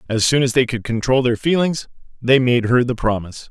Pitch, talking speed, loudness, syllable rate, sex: 125 Hz, 220 wpm, -18 LUFS, 5.7 syllables/s, male